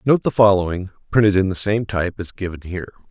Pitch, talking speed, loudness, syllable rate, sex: 100 Hz, 210 wpm, -19 LUFS, 6.8 syllables/s, male